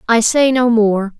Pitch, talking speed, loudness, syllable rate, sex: 230 Hz, 200 wpm, -13 LUFS, 4.0 syllables/s, female